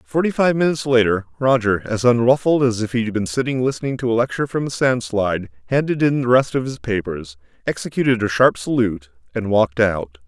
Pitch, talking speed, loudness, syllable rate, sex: 115 Hz, 205 wpm, -19 LUFS, 6.1 syllables/s, male